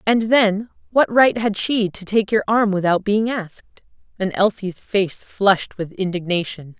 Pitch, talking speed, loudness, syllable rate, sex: 205 Hz, 170 wpm, -19 LUFS, 4.3 syllables/s, female